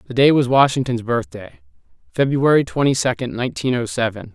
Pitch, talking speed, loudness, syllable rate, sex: 125 Hz, 150 wpm, -18 LUFS, 5.7 syllables/s, male